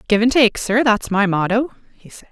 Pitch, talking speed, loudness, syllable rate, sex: 220 Hz, 235 wpm, -16 LUFS, 5.6 syllables/s, female